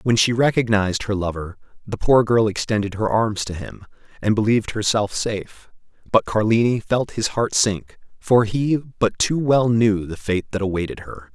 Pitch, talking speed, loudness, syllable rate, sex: 110 Hz, 180 wpm, -20 LUFS, 4.9 syllables/s, male